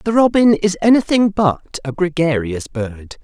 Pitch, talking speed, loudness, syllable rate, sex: 175 Hz, 150 wpm, -16 LUFS, 4.2 syllables/s, female